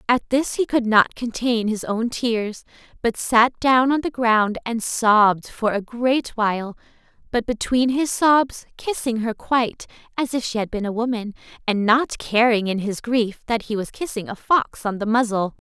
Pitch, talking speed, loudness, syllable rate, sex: 230 Hz, 190 wpm, -21 LUFS, 4.4 syllables/s, female